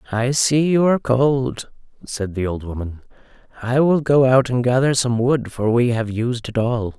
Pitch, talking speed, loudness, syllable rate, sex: 125 Hz, 200 wpm, -18 LUFS, 4.5 syllables/s, male